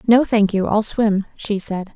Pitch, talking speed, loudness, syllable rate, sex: 210 Hz, 215 wpm, -18 LUFS, 4.1 syllables/s, female